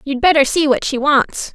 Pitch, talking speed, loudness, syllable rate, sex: 280 Hz, 235 wpm, -15 LUFS, 4.8 syllables/s, female